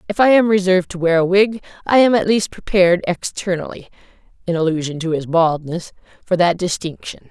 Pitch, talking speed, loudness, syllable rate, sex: 180 Hz, 180 wpm, -17 LUFS, 5.7 syllables/s, female